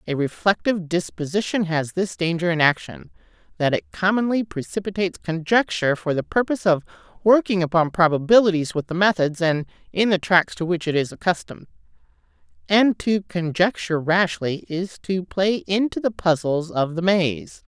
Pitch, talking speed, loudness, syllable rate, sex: 180 Hz, 150 wpm, -21 LUFS, 5.2 syllables/s, female